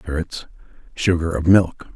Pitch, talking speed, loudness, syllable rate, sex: 85 Hz, 125 wpm, -19 LUFS, 4.4 syllables/s, male